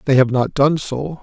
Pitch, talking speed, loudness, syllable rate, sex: 140 Hz, 245 wpm, -17 LUFS, 4.6 syllables/s, male